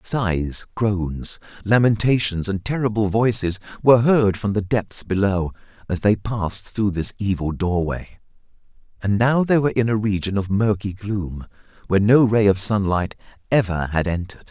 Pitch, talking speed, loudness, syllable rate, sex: 105 Hz, 155 wpm, -20 LUFS, 4.7 syllables/s, male